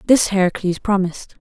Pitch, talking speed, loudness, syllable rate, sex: 195 Hz, 125 wpm, -18 LUFS, 5.7 syllables/s, female